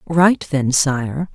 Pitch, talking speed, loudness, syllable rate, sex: 150 Hz, 135 wpm, -17 LUFS, 3.3 syllables/s, female